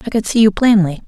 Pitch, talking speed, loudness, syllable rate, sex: 210 Hz, 280 wpm, -13 LUFS, 6.5 syllables/s, female